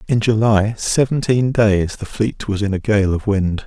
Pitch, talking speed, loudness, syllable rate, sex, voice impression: 105 Hz, 195 wpm, -17 LUFS, 4.3 syllables/s, male, masculine, adult-like, slightly thick, cool, sincere, slightly calm, reassuring, slightly elegant